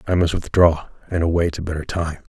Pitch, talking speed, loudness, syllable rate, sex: 80 Hz, 205 wpm, -20 LUFS, 5.7 syllables/s, male